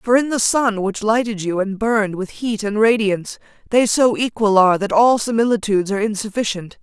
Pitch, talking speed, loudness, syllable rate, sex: 215 Hz, 195 wpm, -18 LUFS, 5.6 syllables/s, female